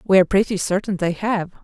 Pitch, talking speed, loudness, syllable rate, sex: 190 Hz, 220 wpm, -20 LUFS, 6.3 syllables/s, female